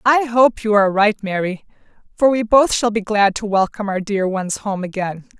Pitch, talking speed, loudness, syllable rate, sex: 210 Hz, 210 wpm, -17 LUFS, 5.1 syllables/s, female